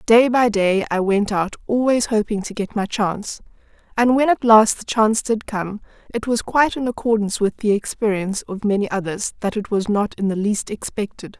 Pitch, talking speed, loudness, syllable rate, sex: 215 Hz, 205 wpm, -20 LUFS, 5.3 syllables/s, female